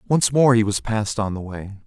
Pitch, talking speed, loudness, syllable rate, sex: 110 Hz, 255 wpm, -20 LUFS, 5.2 syllables/s, male